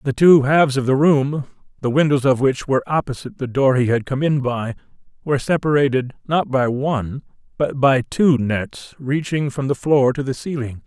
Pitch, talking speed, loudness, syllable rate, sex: 135 Hz, 195 wpm, -18 LUFS, 5.2 syllables/s, male